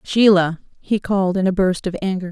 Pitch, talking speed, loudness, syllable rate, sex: 190 Hz, 205 wpm, -18 LUFS, 5.5 syllables/s, female